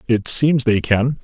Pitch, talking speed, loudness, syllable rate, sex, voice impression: 125 Hz, 195 wpm, -17 LUFS, 3.9 syllables/s, male, very masculine, very adult-like, very middle-aged, very thick, tensed, very powerful, bright, hard, muffled, slightly fluent, cool, very intellectual, sincere, very calm, very mature, friendly, very reassuring, elegant, lively, kind, intense